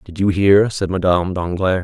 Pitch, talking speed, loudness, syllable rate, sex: 95 Hz, 195 wpm, -17 LUFS, 5.2 syllables/s, male